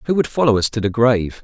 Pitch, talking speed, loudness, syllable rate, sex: 120 Hz, 295 wpm, -17 LUFS, 7.1 syllables/s, male